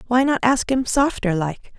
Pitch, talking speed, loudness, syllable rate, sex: 240 Hz, 200 wpm, -20 LUFS, 4.6 syllables/s, female